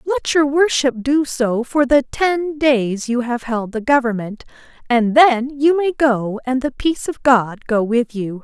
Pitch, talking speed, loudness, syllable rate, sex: 260 Hz, 190 wpm, -17 LUFS, 4.0 syllables/s, female